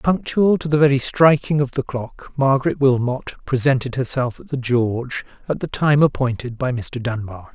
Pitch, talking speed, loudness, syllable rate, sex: 130 Hz, 175 wpm, -19 LUFS, 5.0 syllables/s, male